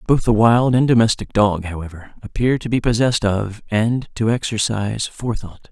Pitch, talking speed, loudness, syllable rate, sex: 110 Hz, 170 wpm, -18 LUFS, 5.2 syllables/s, male